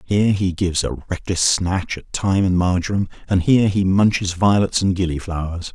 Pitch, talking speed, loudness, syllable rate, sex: 95 Hz, 175 wpm, -19 LUFS, 5.4 syllables/s, male